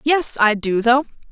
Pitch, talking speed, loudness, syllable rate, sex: 245 Hz, 185 wpm, -17 LUFS, 4.0 syllables/s, female